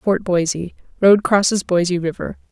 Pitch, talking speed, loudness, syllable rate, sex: 185 Hz, 120 wpm, -17 LUFS, 4.7 syllables/s, female